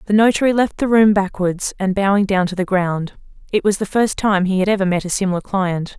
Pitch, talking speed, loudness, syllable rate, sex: 195 Hz, 240 wpm, -17 LUFS, 5.9 syllables/s, female